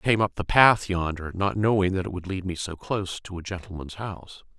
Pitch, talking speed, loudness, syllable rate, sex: 95 Hz, 250 wpm, -25 LUFS, 5.8 syllables/s, male